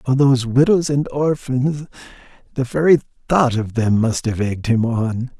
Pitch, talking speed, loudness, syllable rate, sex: 130 Hz, 145 wpm, -18 LUFS, 4.0 syllables/s, male